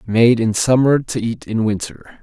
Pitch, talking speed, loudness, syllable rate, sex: 115 Hz, 190 wpm, -17 LUFS, 4.3 syllables/s, male